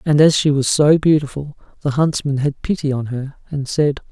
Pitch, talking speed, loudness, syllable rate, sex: 145 Hz, 205 wpm, -17 LUFS, 5.1 syllables/s, male